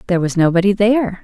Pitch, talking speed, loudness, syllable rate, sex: 190 Hz, 195 wpm, -15 LUFS, 7.6 syllables/s, female